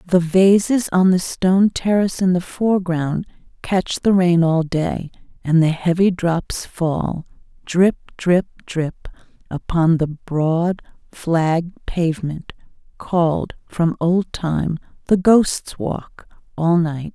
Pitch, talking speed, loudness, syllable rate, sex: 175 Hz, 120 wpm, -19 LUFS, 3.5 syllables/s, female